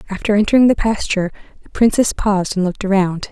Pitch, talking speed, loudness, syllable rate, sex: 200 Hz, 180 wpm, -16 LUFS, 6.8 syllables/s, female